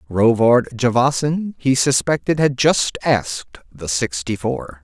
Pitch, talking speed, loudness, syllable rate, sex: 120 Hz, 110 wpm, -18 LUFS, 3.9 syllables/s, male